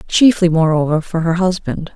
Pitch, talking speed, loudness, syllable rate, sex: 170 Hz, 155 wpm, -15 LUFS, 5.0 syllables/s, female